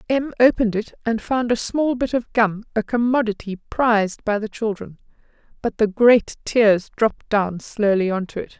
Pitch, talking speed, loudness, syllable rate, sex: 220 Hz, 180 wpm, -20 LUFS, 4.8 syllables/s, female